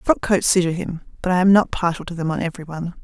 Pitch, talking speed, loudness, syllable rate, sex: 175 Hz, 275 wpm, -20 LUFS, 6.9 syllables/s, female